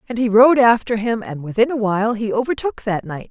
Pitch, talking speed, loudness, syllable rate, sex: 225 Hz, 235 wpm, -17 LUFS, 5.7 syllables/s, female